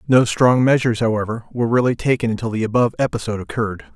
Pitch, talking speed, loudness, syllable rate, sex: 115 Hz, 180 wpm, -18 LUFS, 7.3 syllables/s, male